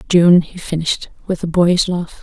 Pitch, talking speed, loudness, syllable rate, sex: 170 Hz, 190 wpm, -16 LUFS, 4.7 syllables/s, female